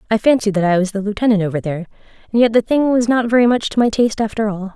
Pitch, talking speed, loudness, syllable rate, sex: 215 Hz, 275 wpm, -16 LUFS, 7.3 syllables/s, female